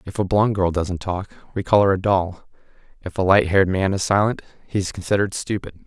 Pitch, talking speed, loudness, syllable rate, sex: 95 Hz, 215 wpm, -21 LUFS, 5.5 syllables/s, male